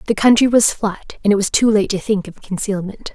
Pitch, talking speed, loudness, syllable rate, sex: 205 Hz, 250 wpm, -17 LUFS, 5.4 syllables/s, female